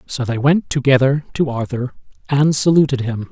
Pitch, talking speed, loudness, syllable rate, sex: 135 Hz, 165 wpm, -17 LUFS, 5.0 syllables/s, male